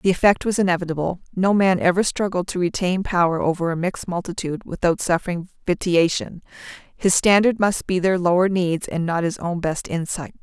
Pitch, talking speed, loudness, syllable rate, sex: 180 Hz, 180 wpm, -21 LUFS, 5.6 syllables/s, female